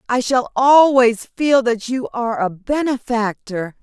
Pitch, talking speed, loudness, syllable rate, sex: 240 Hz, 140 wpm, -17 LUFS, 4.0 syllables/s, female